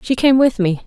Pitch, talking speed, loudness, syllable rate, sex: 235 Hz, 275 wpm, -15 LUFS, 5.4 syllables/s, female